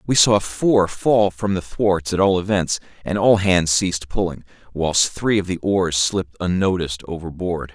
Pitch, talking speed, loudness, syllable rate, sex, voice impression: 95 Hz, 180 wpm, -19 LUFS, 4.6 syllables/s, male, very masculine, adult-like, slightly middle-aged, slightly thick, tensed, powerful, bright, slightly soft, clear, fluent, cool, intellectual, very refreshing, sincere, slightly calm, slightly mature, very friendly, reassuring, very unique, very wild, slightly sweet, lively, kind, intense